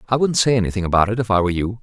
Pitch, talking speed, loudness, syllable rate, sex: 105 Hz, 330 wpm, -18 LUFS, 8.4 syllables/s, male